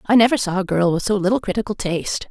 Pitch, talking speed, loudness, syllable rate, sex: 200 Hz, 260 wpm, -19 LUFS, 6.8 syllables/s, female